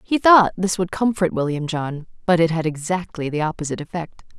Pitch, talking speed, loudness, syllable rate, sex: 170 Hz, 190 wpm, -20 LUFS, 5.6 syllables/s, female